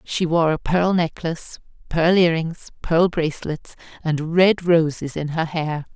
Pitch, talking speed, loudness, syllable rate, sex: 165 Hz, 160 wpm, -20 LUFS, 4.2 syllables/s, female